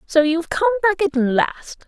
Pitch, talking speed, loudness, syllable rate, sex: 300 Hz, 225 wpm, -19 LUFS, 4.8 syllables/s, female